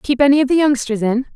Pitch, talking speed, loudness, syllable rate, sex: 265 Hz, 265 wpm, -15 LUFS, 6.4 syllables/s, female